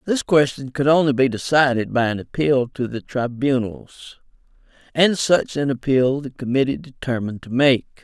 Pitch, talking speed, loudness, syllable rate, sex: 135 Hz, 155 wpm, -20 LUFS, 4.8 syllables/s, male